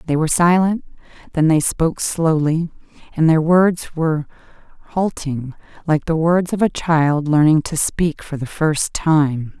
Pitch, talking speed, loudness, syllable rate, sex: 160 Hz, 155 wpm, -18 LUFS, 4.3 syllables/s, female